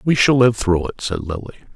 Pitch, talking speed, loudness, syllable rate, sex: 110 Hz, 240 wpm, -18 LUFS, 5.5 syllables/s, male